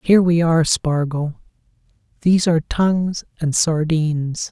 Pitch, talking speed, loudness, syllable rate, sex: 160 Hz, 105 wpm, -18 LUFS, 5.0 syllables/s, male